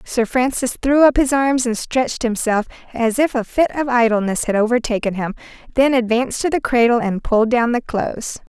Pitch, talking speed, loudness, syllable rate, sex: 240 Hz, 195 wpm, -18 LUFS, 5.4 syllables/s, female